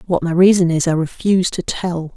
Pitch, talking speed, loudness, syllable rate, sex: 175 Hz, 220 wpm, -16 LUFS, 5.5 syllables/s, female